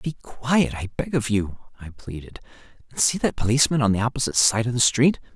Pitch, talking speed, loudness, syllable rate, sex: 120 Hz, 200 wpm, -21 LUFS, 5.8 syllables/s, male